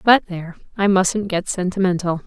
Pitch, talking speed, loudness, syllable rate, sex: 185 Hz, 160 wpm, -19 LUFS, 5.1 syllables/s, female